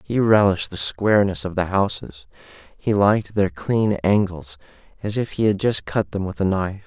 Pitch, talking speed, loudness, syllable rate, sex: 95 Hz, 190 wpm, -21 LUFS, 5.1 syllables/s, male